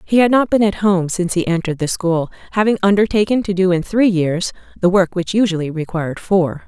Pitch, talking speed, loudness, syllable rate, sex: 185 Hz, 215 wpm, -17 LUFS, 5.9 syllables/s, female